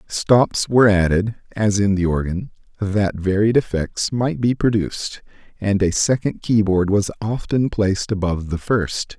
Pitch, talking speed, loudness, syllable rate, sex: 105 Hz, 150 wpm, -19 LUFS, 4.4 syllables/s, male